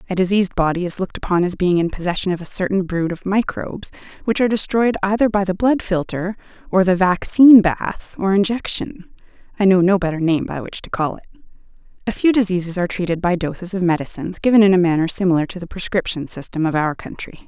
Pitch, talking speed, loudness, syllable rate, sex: 185 Hz, 210 wpm, -18 LUFS, 5.8 syllables/s, female